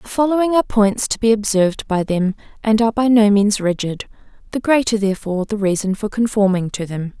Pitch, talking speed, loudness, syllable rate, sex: 210 Hz, 200 wpm, -17 LUFS, 5.9 syllables/s, female